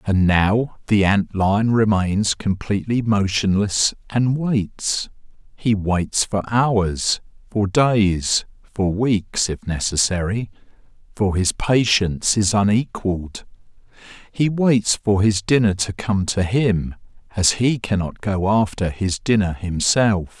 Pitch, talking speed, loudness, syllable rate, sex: 105 Hz, 125 wpm, -19 LUFS, 3.6 syllables/s, male